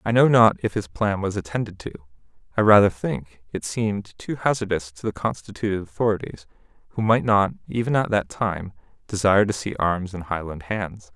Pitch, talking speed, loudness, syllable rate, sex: 100 Hz, 185 wpm, -23 LUFS, 5.4 syllables/s, male